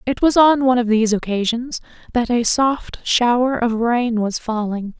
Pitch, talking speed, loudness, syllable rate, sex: 240 Hz, 180 wpm, -18 LUFS, 4.7 syllables/s, female